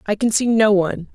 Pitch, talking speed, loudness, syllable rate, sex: 210 Hz, 265 wpm, -17 LUFS, 6.0 syllables/s, female